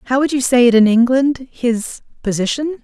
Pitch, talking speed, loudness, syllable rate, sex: 250 Hz, 170 wpm, -15 LUFS, 5.1 syllables/s, female